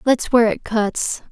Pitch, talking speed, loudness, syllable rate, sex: 230 Hz, 185 wpm, -18 LUFS, 4.4 syllables/s, female